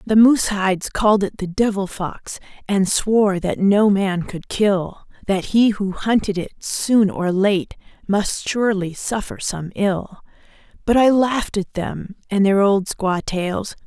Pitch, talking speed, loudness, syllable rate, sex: 200 Hz, 170 wpm, -19 LUFS, 4.1 syllables/s, female